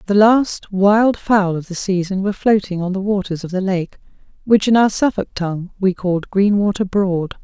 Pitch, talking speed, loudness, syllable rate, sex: 195 Hz, 195 wpm, -17 LUFS, 5.0 syllables/s, female